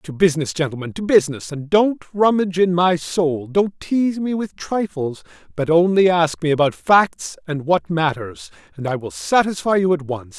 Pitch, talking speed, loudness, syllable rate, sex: 165 Hz, 185 wpm, -19 LUFS, 4.9 syllables/s, male